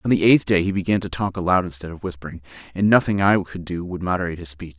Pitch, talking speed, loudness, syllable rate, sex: 90 Hz, 265 wpm, -21 LUFS, 6.9 syllables/s, male